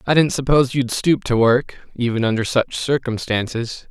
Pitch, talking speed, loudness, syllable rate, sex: 125 Hz, 170 wpm, -19 LUFS, 4.9 syllables/s, male